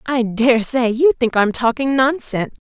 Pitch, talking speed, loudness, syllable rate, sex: 245 Hz, 180 wpm, -17 LUFS, 4.6 syllables/s, female